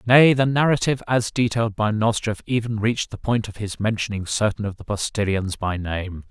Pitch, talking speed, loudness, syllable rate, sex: 110 Hz, 190 wpm, -22 LUFS, 5.5 syllables/s, male